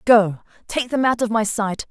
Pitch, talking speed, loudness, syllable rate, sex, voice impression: 225 Hz, 220 wpm, -20 LUFS, 4.6 syllables/s, female, very feminine, slightly young, thin, slightly tensed, powerful, slightly bright, soft, clear, fluent, slightly raspy, cute, intellectual, refreshing, very sincere, calm, friendly, reassuring, unique, slightly elegant, wild, sweet, lively, slightly strict, slightly intense, slightly sharp, slightly modest, light